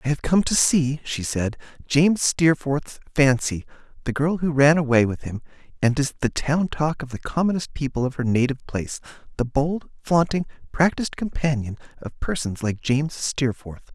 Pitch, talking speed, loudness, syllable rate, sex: 140 Hz, 170 wpm, -22 LUFS, 5.0 syllables/s, male